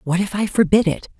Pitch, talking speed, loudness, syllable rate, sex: 190 Hz, 250 wpm, -18 LUFS, 6.1 syllables/s, female